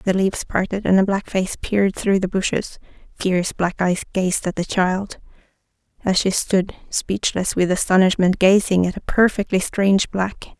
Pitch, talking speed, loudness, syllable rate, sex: 190 Hz, 170 wpm, -19 LUFS, 4.8 syllables/s, female